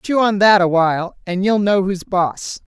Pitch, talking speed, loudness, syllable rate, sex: 190 Hz, 220 wpm, -16 LUFS, 4.4 syllables/s, female